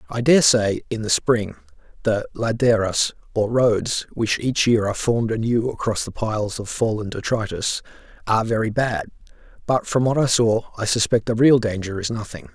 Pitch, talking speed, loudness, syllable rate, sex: 110 Hz, 175 wpm, -21 LUFS, 5.1 syllables/s, male